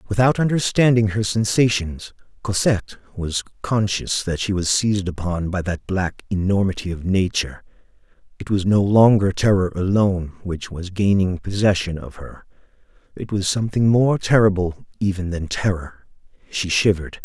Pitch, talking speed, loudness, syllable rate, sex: 100 Hz, 140 wpm, -20 LUFS, 5.0 syllables/s, male